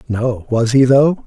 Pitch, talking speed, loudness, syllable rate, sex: 125 Hz, 190 wpm, -14 LUFS, 3.8 syllables/s, male